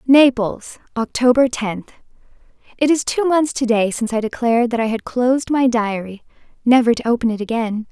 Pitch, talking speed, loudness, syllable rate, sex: 240 Hz, 165 wpm, -17 LUFS, 5.3 syllables/s, female